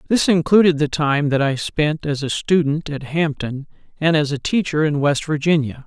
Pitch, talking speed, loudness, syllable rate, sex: 150 Hz, 195 wpm, -19 LUFS, 4.9 syllables/s, male